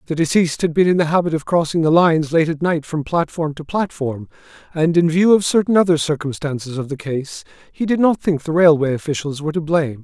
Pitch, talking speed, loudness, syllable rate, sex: 160 Hz, 225 wpm, -18 LUFS, 6.0 syllables/s, male